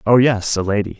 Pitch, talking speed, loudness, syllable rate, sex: 110 Hz, 180 wpm, -17 LUFS, 5.8 syllables/s, male